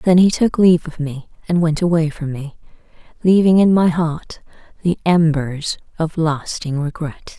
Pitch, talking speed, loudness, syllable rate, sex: 165 Hz, 160 wpm, -17 LUFS, 4.5 syllables/s, female